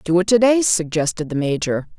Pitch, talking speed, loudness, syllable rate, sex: 180 Hz, 210 wpm, -18 LUFS, 5.5 syllables/s, female